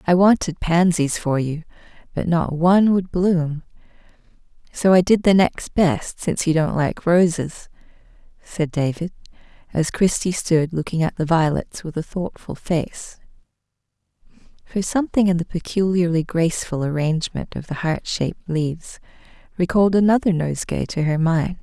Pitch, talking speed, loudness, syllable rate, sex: 170 Hz, 145 wpm, -20 LUFS, 4.9 syllables/s, female